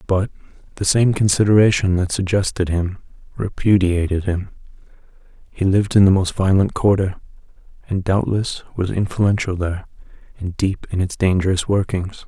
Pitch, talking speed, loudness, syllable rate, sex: 95 Hz, 130 wpm, -19 LUFS, 5.2 syllables/s, male